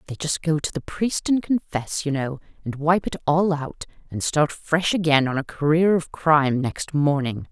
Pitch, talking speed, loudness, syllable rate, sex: 155 Hz, 210 wpm, -22 LUFS, 4.7 syllables/s, female